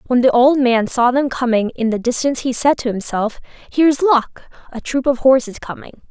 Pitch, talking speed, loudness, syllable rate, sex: 250 Hz, 205 wpm, -16 LUFS, 5.4 syllables/s, female